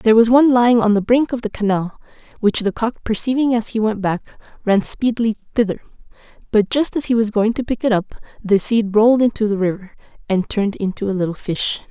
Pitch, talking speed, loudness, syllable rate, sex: 220 Hz, 215 wpm, -18 LUFS, 6.0 syllables/s, female